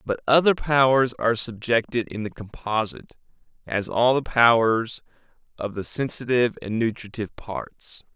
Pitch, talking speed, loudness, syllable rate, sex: 115 Hz, 130 wpm, -23 LUFS, 4.8 syllables/s, male